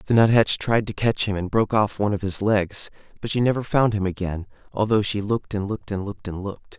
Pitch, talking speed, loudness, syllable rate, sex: 105 Hz, 250 wpm, -22 LUFS, 6.3 syllables/s, male